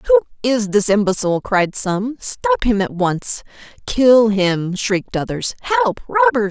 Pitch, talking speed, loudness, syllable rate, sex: 200 Hz, 150 wpm, -17 LUFS, 4.0 syllables/s, female